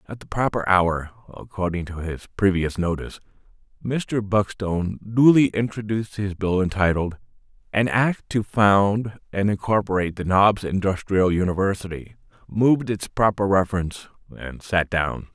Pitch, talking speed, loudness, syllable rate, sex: 100 Hz, 130 wpm, -22 LUFS, 4.9 syllables/s, male